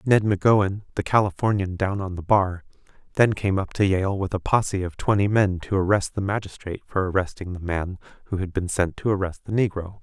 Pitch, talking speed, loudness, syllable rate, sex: 95 Hz, 210 wpm, -23 LUFS, 5.5 syllables/s, male